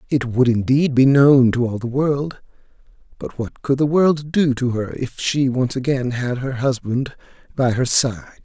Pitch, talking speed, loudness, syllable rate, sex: 130 Hz, 190 wpm, -18 LUFS, 4.4 syllables/s, male